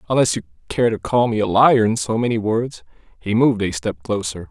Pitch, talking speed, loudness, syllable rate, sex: 110 Hz, 225 wpm, -19 LUFS, 5.7 syllables/s, male